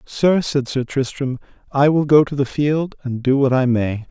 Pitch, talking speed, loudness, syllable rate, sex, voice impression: 135 Hz, 220 wpm, -18 LUFS, 4.5 syllables/s, male, masculine, middle-aged, relaxed, powerful, soft, muffled, slightly raspy, mature, wild, slightly lively, strict